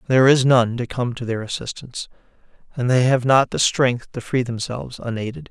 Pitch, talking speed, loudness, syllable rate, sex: 125 Hz, 195 wpm, -20 LUFS, 5.6 syllables/s, male